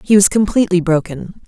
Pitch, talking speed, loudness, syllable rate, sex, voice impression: 190 Hz, 160 wpm, -14 LUFS, 5.9 syllables/s, female, feminine, adult-like, slightly fluent, intellectual, elegant, slightly sharp